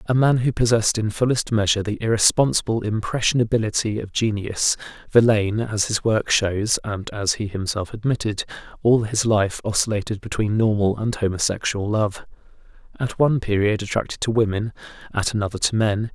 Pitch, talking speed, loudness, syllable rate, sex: 110 Hz, 145 wpm, -21 LUFS, 5.5 syllables/s, male